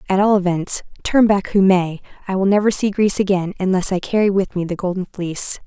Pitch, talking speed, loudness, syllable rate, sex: 190 Hz, 220 wpm, -18 LUFS, 5.9 syllables/s, female